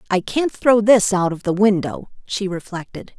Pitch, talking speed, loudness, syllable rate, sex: 200 Hz, 190 wpm, -18 LUFS, 4.6 syllables/s, female